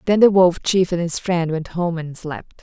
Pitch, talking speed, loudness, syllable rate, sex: 175 Hz, 250 wpm, -18 LUFS, 4.6 syllables/s, female